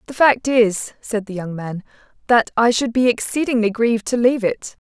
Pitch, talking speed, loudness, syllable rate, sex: 230 Hz, 195 wpm, -18 LUFS, 5.2 syllables/s, female